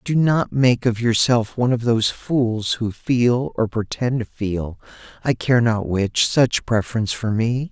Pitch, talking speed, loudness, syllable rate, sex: 115 Hz, 180 wpm, -20 LUFS, 4.2 syllables/s, male